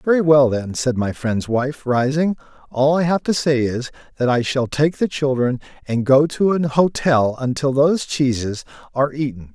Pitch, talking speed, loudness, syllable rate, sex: 135 Hz, 190 wpm, -19 LUFS, 4.7 syllables/s, male